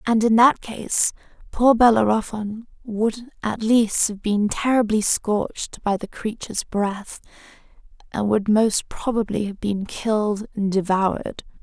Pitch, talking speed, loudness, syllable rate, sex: 215 Hz, 135 wpm, -21 LUFS, 4.0 syllables/s, female